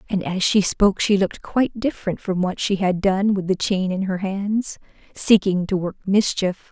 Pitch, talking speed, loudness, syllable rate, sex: 195 Hz, 205 wpm, -21 LUFS, 4.9 syllables/s, female